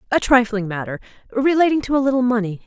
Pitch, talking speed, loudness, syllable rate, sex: 240 Hz, 180 wpm, -18 LUFS, 6.6 syllables/s, female